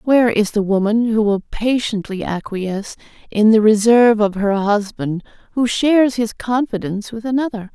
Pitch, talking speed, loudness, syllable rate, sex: 220 Hz, 155 wpm, -17 LUFS, 5.0 syllables/s, female